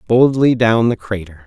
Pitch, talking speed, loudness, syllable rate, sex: 115 Hz, 165 wpm, -15 LUFS, 4.7 syllables/s, male